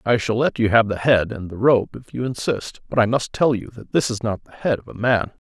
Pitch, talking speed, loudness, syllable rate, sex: 115 Hz, 295 wpm, -21 LUFS, 5.4 syllables/s, male